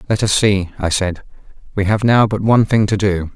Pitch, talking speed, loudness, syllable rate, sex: 100 Hz, 235 wpm, -16 LUFS, 5.5 syllables/s, male